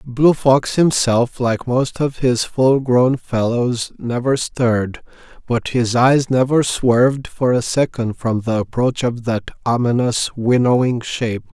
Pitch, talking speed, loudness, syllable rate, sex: 125 Hz, 145 wpm, -17 LUFS, 3.8 syllables/s, male